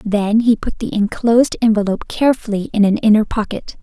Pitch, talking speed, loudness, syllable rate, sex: 215 Hz, 175 wpm, -16 LUFS, 5.8 syllables/s, female